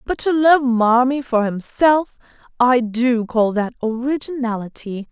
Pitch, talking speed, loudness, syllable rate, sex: 245 Hz, 130 wpm, -18 LUFS, 4.1 syllables/s, female